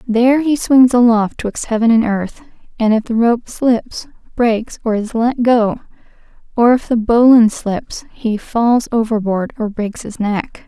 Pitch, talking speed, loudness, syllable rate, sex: 230 Hz, 170 wpm, -15 LUFS, 4.1 syllables/s, female